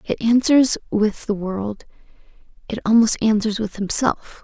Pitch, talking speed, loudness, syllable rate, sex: 215 Hz, 135 wpm, -19 LUFS, 4.3 syllables/s, female